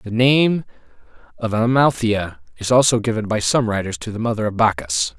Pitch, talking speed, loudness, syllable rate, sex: 115 Hz, 175 wpm, -18 LUFS, 5.2 syllables/s, male